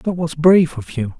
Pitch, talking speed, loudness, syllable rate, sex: 150 Hz, 250 wpm, -16 LUFS, 5.3 syllables/s, male